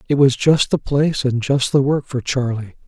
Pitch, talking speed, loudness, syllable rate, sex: 130 Hz, 230 wpm, -18 LUFS, 5.0 syllables/s, male